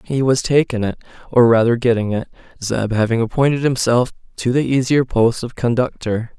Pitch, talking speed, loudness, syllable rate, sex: 120 Hz, 160 wpm, -17 LUFS, 5.2 syllables/s, male